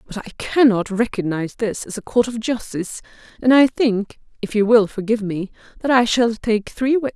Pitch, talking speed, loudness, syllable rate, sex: 225 Hz, 200 wpm, -19 LUFS, 5.5 syllables/s, female